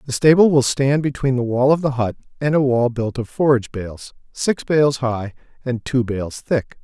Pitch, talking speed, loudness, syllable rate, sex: 130 Hz, 210 wpm, -19 LUFS, 4.7 syllables/s, male